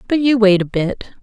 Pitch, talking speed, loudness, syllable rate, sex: 220 Hz, 245 wpm, -15 LUFS, 5.0 syllables/s, female